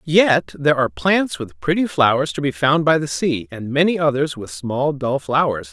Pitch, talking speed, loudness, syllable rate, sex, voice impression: 140 Hz, 210 wpm, -19 LUFS, 4.9 syllables/s, male, masculine, adult-like, thick, tensed, powerful, bright, clear, fluent, cool, friendly, reassuring, wild, lively, slightly kind